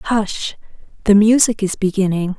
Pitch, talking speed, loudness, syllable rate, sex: 205 Hz, 125 wpm, -16 LUFS, 4.3 syllables/s, female